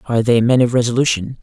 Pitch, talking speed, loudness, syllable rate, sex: 120 Hz, 210 wpm, -15 LUFS, 6.9 syllables/s, male